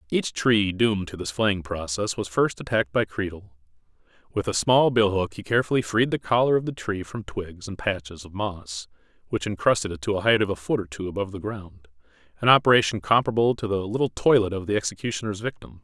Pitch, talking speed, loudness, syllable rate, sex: 105 Hz, 210 wpm, -24 LUFS, 6.0 syllables/s, male